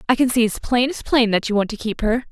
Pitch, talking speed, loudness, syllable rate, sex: 230 Hz, 335 wpm, -19 LUFS, 6.1 syllables/s, female